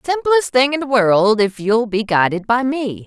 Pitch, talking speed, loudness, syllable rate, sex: 235 Hz, 215 wpm, -16 LUFS, 4.4 syllables/s, female